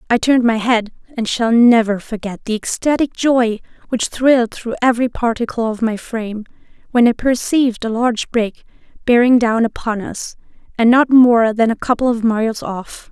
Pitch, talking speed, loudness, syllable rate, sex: 235 Hz, 175 wpm, -16 LUFS, 5.2 syllables/s, female